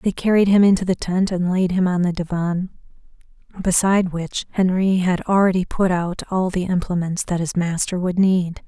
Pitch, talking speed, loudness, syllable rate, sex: 180 Hz, 185 wpm, -19 LUFS, 5.0 syllables/s, female